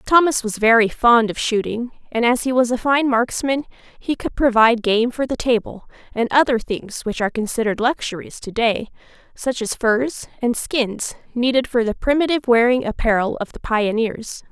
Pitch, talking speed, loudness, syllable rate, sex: 240 Hz, 180 wpm, -19 LUFS, 5.1 syllables/s, female